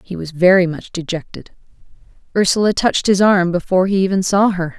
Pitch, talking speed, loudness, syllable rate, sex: 185 Hz, 165 wpm, -16 LUFS, 5.9 syllables/s, female